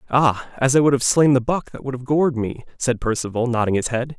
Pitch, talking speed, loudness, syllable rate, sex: 130 Hz, 260 wpm, -20 LUFS, 5.8 syllables/s, male